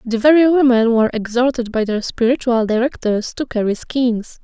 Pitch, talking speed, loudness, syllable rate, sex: 240 Hz, 160 wpm, -16 LUFS, 5.4 syllables/s, female